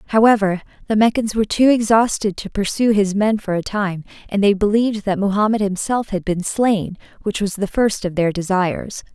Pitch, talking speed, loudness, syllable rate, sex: 205 Hz, 190 wpm, -18 LUFS, 5.2 syllables/s, female